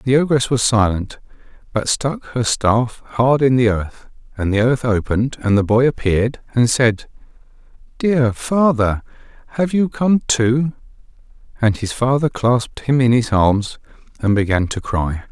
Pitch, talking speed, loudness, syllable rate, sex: 120 Hz, 155 wpm, -17 LUFS, 4.3 syllables/s, male